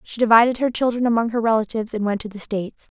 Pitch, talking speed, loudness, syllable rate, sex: 225 Hz, 240 wpm, -20 LUFS, 7.1 syllables/s, female